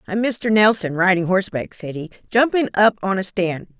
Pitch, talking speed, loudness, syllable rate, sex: 195 Hz, 190 wpm, -19 LUFS, 5.2 syllables/s, female